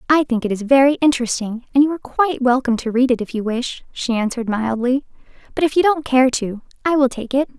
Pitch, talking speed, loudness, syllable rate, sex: 255 Hz, 235 wpm, -18 LUFS, 6.4 syllables/s, female